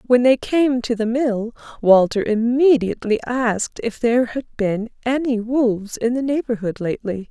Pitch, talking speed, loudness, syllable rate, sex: 235 Hz, 155 wpm, -19 LUFS, 4.9 syllables/s, female